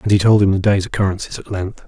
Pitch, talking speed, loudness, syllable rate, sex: 100 Hz, 290 wpm, -17 LUFS, 6.6 syllables/s, male